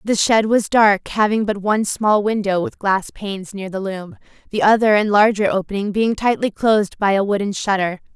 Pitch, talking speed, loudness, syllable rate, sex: 205 Hz, 200 wpm, -18 LUFS, 5.2 syllables/s, female